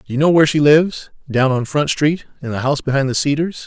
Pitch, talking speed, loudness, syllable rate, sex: 145 Hz, 245 wpm, -16 LUFS, 6.5 syllables/s, male